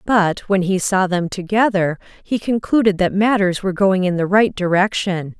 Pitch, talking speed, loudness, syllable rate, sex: 190 Hz, 180 wpm, -17 LUFS, 4.8 syllables/s, female